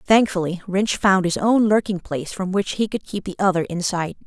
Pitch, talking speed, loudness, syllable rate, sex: 190 Hz, 225 wpm, -21 LUFS, 5.3 syllables/s, female